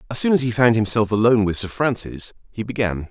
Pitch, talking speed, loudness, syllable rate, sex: 110 Hz, 230 wpm, -19 LUFS, 6.2 syllables/s, male